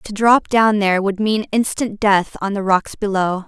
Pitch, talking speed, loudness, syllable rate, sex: 205 Hz, 205 wpm, -17 LUFS, 4.5 syllables/s, female